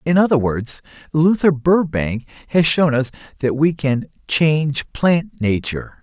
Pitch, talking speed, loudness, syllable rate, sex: 145 Hz, 140 wpm, -18 LUFS, 4.1 syllables/s, male